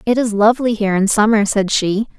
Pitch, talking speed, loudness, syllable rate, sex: 215 Hz, 220 wpm, -15 LUFS, 6.1 syllables/s, female